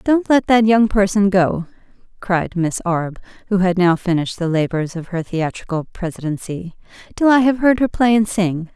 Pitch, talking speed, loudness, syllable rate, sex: 195 Hz, 185 wpm, -17 LUFS, 5.1 syllables/s, female